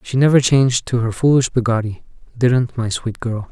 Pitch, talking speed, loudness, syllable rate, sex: 120 Hz, 190 wpm, -17 LUFS, 5.2 syllables/s, male